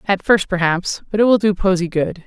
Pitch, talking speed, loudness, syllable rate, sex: 190 Hz, 240 wpm, -17 LUFS, 5.4 syllables/s, female